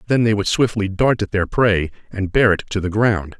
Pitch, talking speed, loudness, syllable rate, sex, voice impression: 105 Hz, 250 wpm, -18 LUFS, 5.1 syllables/s, male, very masculine, very middle-aged, very thick, tensed, very powerful, bright, very soft, muffled, fluent, slightly raspy, very cool, intellectual, slightly refreshing, sincere, very calm, very mature, friendly, reassuring, very unique, slightly elegant, very wild, sweet, lively, kind